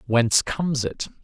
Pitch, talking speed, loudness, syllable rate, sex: 125 Hz, 145 wpm, -22 LUFS, 5.2 syllables/s, male